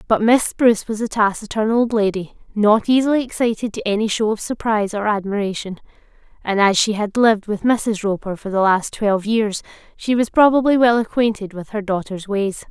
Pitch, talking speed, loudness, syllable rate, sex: 215 Hz, 190 wpm, -18 LUFS, 5.5 syllables/s, female